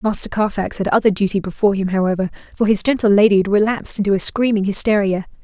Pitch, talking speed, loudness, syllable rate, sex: 200 Hz, 200 wpm, -17 LUFS, 6.8 syllables/s, female